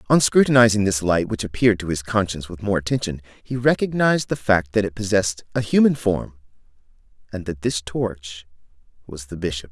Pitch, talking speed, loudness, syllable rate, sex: 100 Hz, 180 wpm, -20 LUFS, 5.8 syllables/s, male